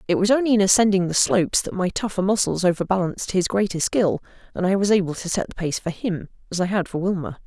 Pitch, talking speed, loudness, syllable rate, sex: 185 Hz, 240 wpm, -21 LUFS, 6.4 syllables/s, female